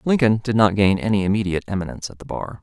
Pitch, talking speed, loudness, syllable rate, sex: 105 Hz, 230 wpm, -20 LUFS, 7.2 syllables/s, male